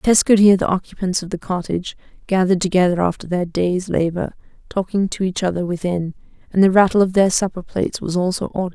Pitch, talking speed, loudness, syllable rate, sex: 185 Hz, 185 wpm, -18 LUFS, 6.2 syllables/s, female